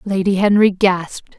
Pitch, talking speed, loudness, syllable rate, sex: 195 Hz, 130 wpm, -15 LUFS, 4.7 syllables/s, female